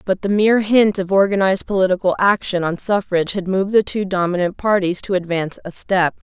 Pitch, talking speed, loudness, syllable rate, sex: 190 Hz, 190 wpm, -18 LUFS, 5.9 syllables/s, female